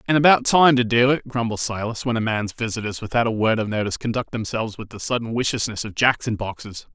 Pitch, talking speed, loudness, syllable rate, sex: 115 Hz, 235 wpm, -21 LUFS, 6.2 syllables/s, male